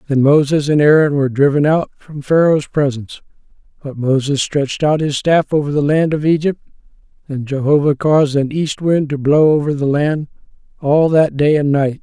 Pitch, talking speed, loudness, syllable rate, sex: 145 Hz, 185 wpm, -15 LUFS, 5.2 syllables/s, male